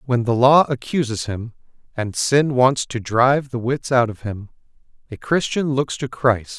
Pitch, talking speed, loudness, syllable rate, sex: 125 Hz, 180 wpm, -19 LUFS, 4.4 syllables/s, male